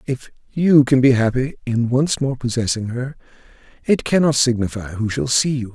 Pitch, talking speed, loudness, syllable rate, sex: 125 Hz, 180 wpm, -18 LUFS, 4.9 syllables/s, male